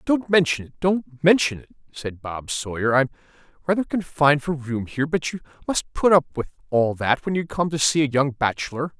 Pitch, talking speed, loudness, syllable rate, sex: 145 Hz, 205 wpm, -22 LUFS, 5.2 syllables/s, male